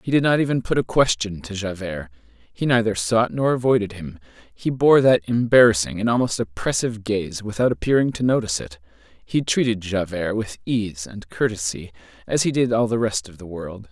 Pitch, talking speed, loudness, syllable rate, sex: 105 Hz, 190 wpm, -21 LUFS, 5.4 syllables/s, male